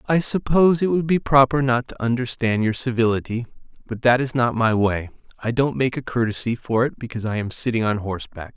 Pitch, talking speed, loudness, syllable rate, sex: 120 Hz, 195 wpm, -21 LUFS, 5.9 syllables/s, male